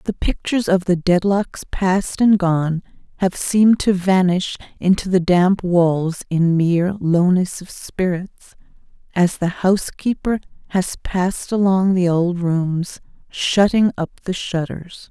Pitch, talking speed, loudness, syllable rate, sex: 180 Hz, 135 wpm, -18 LUFS, 4.1 syllables/s, female